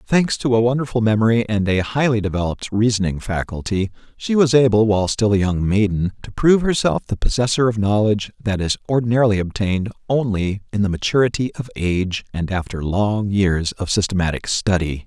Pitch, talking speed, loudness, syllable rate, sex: 105 Hz, 170 wpm, -19 LUFS, 5.8 syllables/s, male